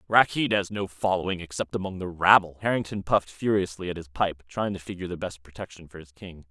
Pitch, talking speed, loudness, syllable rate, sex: 90 Hz, 210 wpm, -26 LUFS, 6.1 syllables/s, male